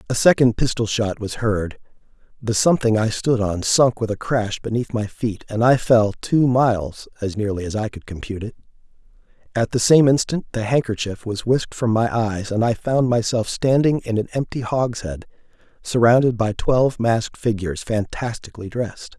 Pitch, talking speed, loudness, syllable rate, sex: 115 Hz, 180 wpm, -20 LUFS, 5.2 syllables/s, male